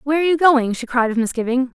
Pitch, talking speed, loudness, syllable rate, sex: 265 Hz, 270 wpm, -18 LUFS, 7.3 syllables/s, female